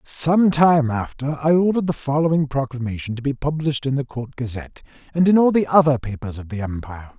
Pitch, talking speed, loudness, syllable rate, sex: 145 Hz, 200 wpm, -20 LUFS, 6.0 syllables/s, male